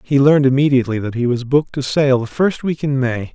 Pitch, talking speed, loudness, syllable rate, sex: 135 Hz, 250 wpm, -16 LUFS, 6.2 syllables/s, male